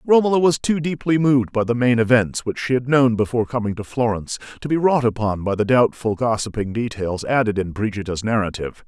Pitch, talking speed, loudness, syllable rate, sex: 120 Hz, 205 wpm, -20 LUFS, 6.0 syllables/s, male